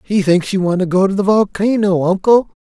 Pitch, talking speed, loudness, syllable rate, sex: 195 Hz, 230 wpm, -14 LUFS, 5.4 syllables/s, male